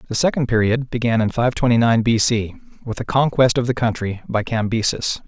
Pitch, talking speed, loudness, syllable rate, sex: 115 Hz, 205 wpm, -19 LUFS, 5.5 syllables/s, male